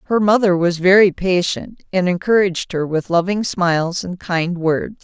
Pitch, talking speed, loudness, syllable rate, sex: 180 Hz, 165 wpm, -17 LUFS, 4.7 syllables/s, female